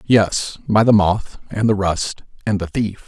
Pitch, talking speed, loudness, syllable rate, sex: 100 Hz, 195 wpm, -18 LUFS, 4.0 syllables/s, male